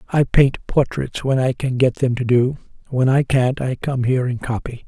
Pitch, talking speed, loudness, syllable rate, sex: 130 Hz, 220 wpm, -19 LUFS, 5.0 syllables/s, male